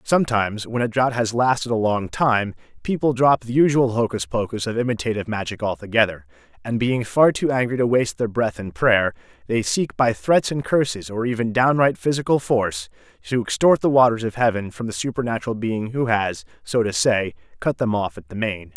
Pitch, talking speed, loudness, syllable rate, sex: 115 Hz, 200 wpm, -21 LUFS, 5.5 syllables/s, male